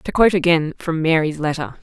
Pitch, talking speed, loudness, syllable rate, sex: 165 Hz, 195 wpm, -18 LUFS, 5.8 syllables/s, female